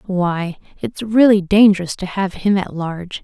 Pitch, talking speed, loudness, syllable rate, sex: 190 Hz, 165 wpm, -16 LUFS, 4.6 syllables/s, female